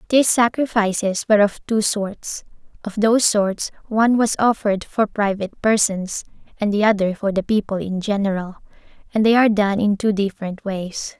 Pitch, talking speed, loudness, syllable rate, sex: 205 Hz, 165 wpm, -19 LUFS, 5.3 syllables/s, female